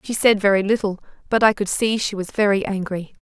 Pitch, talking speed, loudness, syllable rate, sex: 205 Hz, 225 wpm, -20 LUFS, 5.8 syllables/s, female